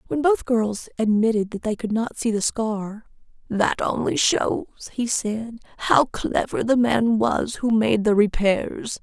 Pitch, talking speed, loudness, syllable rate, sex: 220 Hz, 165 wpm, -22 LUFS, 3.9 syllables/s, female